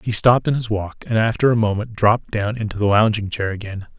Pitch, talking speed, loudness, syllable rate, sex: 110 Hz, 240 wpm, -19 LUFS, 6.1 syllables/s, male